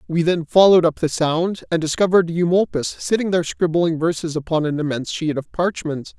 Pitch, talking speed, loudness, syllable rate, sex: 165 Hz, 185 wpm, -19 LUFS, 5.7 syllables/s, male